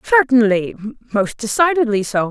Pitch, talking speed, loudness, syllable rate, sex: 235 Hz, 105 wpm, -16 LUFS, 5.0 syllables/s, female